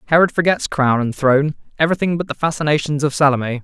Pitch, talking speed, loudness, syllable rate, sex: 150 Hz, 165 wpm, -17 LUFS, 6.9 syllables/s, male